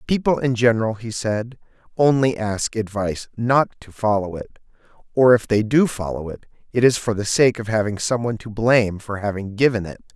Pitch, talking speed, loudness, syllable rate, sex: 110 Hz, 190 wpm, -20 LUFS, 5.5 syllables/s, male